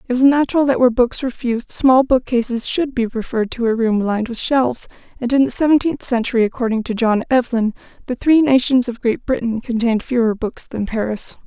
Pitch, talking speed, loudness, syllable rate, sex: 240 Hz, 205 wpm, -17 LUFS, 6.0 syllables/s, female